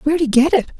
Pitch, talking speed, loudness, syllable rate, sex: 285 Hz, 305 wpm, -15 LUFS, 6.9 syllables/s, male